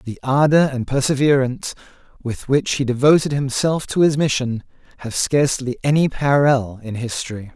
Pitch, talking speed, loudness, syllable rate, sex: 135 Hz, 145 wpm, -18 LUFS, 5.3 syllables/s, male